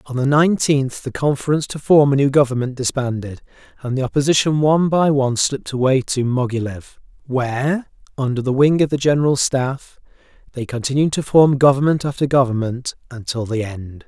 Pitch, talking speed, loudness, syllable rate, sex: 135 Hz, 165 wpm, -18 LUFS, 5.7 syllables/s, male